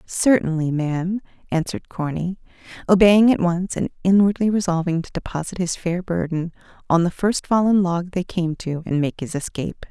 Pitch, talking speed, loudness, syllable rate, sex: 180 Hz, 165 wpm, -21 LUFS, 5.2 syllables/s, female